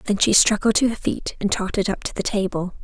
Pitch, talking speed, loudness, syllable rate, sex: 200 Hz, 255 wpm, -20 LUFS, 6.2 syllables/s, female